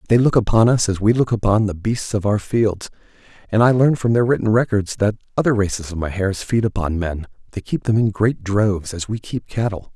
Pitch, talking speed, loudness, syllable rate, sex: 105 Hz, 225 wpm, -19 LUFS, 5.5 syllables/s, male